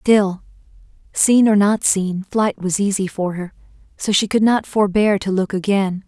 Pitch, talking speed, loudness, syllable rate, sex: 200 Hz, 180 wpm, -17 LUFS, 4.3 syllables/s, female